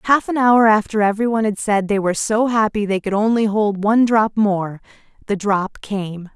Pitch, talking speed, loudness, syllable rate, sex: 210 Hz, 200 wpm, -17 LUFS, 5.1 syllables/s, female